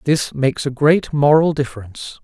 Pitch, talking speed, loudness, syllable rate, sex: 140 Hz, 160 wpm, -17 LUFS, 5.3 syllables/s, male